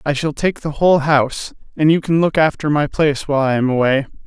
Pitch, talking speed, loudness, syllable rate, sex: 145 Hz, 240 wpm, -16 LUFS, 6.1 syllables/s, male